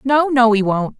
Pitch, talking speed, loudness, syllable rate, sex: 240 Hz, 240 wpm, -15 LUFS, 4.5 syllables/s, female